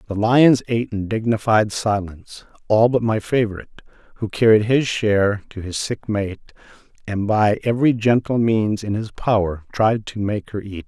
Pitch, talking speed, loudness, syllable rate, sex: 110 Hz, 170 wpm, -19 LUFS, 5.0 syllables/s, male